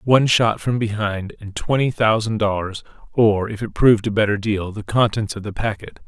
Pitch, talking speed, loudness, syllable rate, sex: 110 Hz, 180 wpm, -20 LUFS, 5.2 syllables/s, male